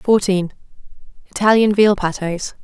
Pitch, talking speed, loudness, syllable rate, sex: 195 Hz, 70 wpm, -16 LUFS, 5.3 syllables/s, female